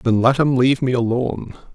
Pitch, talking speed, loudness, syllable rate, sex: 125 Hz, 205 wpm, -18 LUFS, 6.0 syllables/s, male